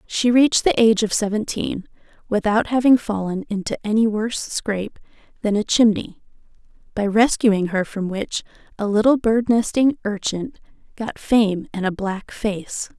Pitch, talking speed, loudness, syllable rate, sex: 215 Hz, 150 wpm, -20 LUFS, 4.7 syllables/s, female